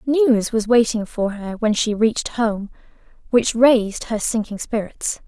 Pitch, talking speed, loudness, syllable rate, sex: 225 Hz, 160 wpm, -19 LUFS, 4.3 syllables/s, female